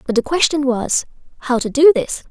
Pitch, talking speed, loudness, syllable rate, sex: 275 Hz, 210 wpm, -16 LUFS, 5.4 syllables/s, female